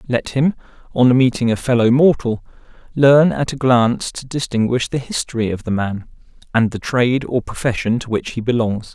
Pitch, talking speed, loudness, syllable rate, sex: 120 Hz, 180 wpm, -17 LUFS, 5.2 syllables/s, male